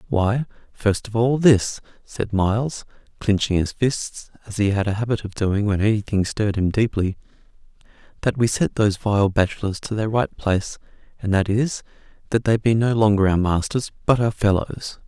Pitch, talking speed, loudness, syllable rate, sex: 105 Hz, 180 wpm, -21 LUFS, 5.0 syllables/s, male